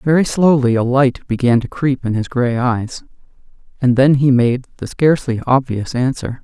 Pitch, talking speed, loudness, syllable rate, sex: 130 Hz, 175 wpm, -16 LUFS, 4.8 syllables/s, male